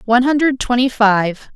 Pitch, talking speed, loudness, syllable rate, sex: 240 Hz, 155 wpm, -15 LUFS, 5.0 syllables/s, female